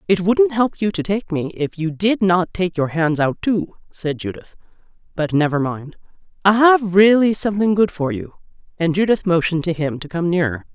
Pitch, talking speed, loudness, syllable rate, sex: 180 Hz, 200 wpm, -18 LUFS, 5.1 syllables/s, female